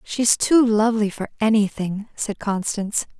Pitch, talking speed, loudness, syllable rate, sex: 215 Hz, 130 wpm, -20 LUFS, 4.6 syllables/s, female